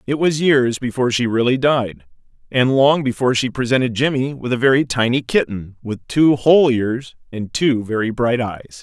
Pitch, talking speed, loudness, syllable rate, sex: 125 Hz, 185 wpm, -17 LUFS, 5.0 syllables/s, male